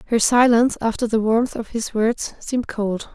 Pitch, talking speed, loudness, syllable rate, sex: 225 Hz, 190 wpm, -20 LUFS, 4.9 syllables/s, female